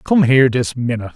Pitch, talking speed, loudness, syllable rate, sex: 125 Hz, 210 wpm, -15 LUFS, 6.7 syllables/s, male